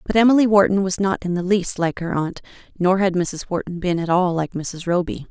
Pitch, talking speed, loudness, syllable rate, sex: 185 Hz, 240 wpm, -20 LUFS, 5.5 syllables/s, female